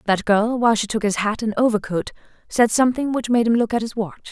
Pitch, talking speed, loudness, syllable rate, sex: 225 Hz, 250 wpm, -20 LUFS, 6.1 syllables/s, female